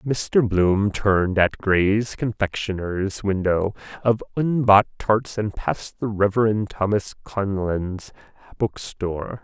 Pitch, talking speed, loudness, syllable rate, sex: 100 Hz, 110 wpm, -22 LUFS, 3.8 syllables/s, male